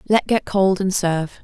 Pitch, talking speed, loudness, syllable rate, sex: 190 Hz, 210 wpm, -19 LUFS, 4.7 syllables/s, female